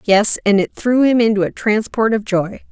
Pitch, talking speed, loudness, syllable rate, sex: 215 Hz, 220 wpm, -16 LUFS, 4.8 syllables/s, female